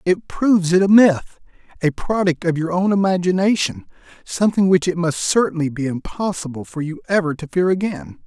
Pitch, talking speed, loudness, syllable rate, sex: 175 Hz, 175 wpm, -18 LUFS, 5.5 syllables/s, male